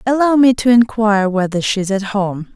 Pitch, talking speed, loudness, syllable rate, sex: 215 Hz, 210 wpm, -14 LUFS, 5.4 syllables/s, female